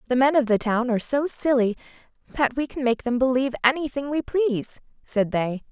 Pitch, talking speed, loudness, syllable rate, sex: 255 Hz, 200 wpm, -23 LUFS, 5.6 syllables/s, female